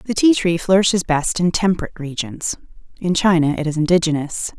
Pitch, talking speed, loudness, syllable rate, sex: 175 Hz, 170 wpm, -18 LUFS, 5.6 syllables/s, female